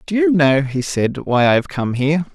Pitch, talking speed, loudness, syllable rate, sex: 145 Hz, 255 wpm, -17 LUFS, 5.1 syllables/s, male